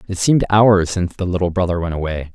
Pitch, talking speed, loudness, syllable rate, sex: 90 Hz, 230 wpm, -17 LUFS, 6.5 syllables/s, male